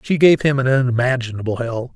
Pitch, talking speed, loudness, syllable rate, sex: 130 Hz, 185 wpm, -17 LUFS, 6.0 syllables/s, male